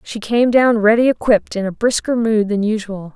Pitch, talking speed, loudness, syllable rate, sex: 220 Hz, 210 wpm, -16 LUFS, 5.3 syllables/s, female